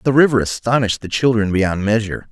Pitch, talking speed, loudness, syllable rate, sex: 115 Hz, 180 wpm, -17 LUFS, 6.4 syllables/s, male